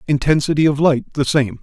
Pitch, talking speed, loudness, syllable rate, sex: 145 Hz, 185 wpm, -16 LUFS, 5.4 syllables/s, male